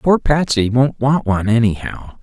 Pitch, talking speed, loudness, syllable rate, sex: 125 Hz, 160 wpm, -16 LUFS, 4.6 syllables/s, male